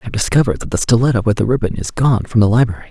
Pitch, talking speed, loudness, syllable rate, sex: 115 Hz, 290 wpm, -15 LUFS, 7.7 syllables/s, male